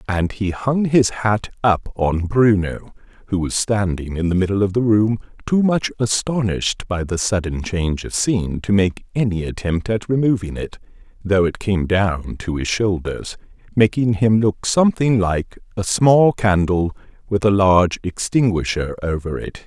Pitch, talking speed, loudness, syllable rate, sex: 100 Hz, 165 wpm, -19 LUFS, 4.5 syllables/s, male